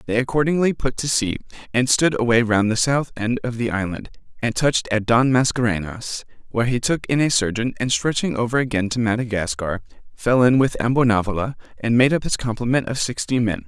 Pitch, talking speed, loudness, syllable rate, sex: 120 Hz, 195 wpm, -20 LUFS, 5.7 syllables/s, male